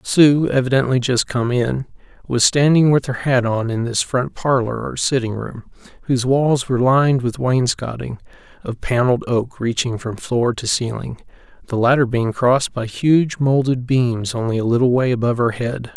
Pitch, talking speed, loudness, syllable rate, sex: 125 Hz, 175 wpm, -18 LUFS, 4.9 syllables/s, male